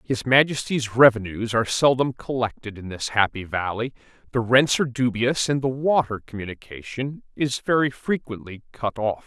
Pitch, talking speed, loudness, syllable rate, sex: 120 Hz, 150 wpm, -22 LUFS, 5.0 syllables/s, male